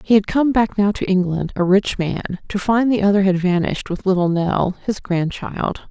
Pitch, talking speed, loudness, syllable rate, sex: 195 Hz, 215 wpm, -19 LUFS, 5.0 syllables/s, female